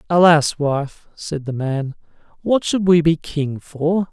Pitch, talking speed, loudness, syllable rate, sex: 155 Hz, 160 wpm, -18 LUFS, 3.6 syllables/s, male